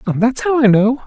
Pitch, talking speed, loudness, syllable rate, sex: 235 Hz, 225 wpm, -14 LUFS, 4.4 syllables/s, male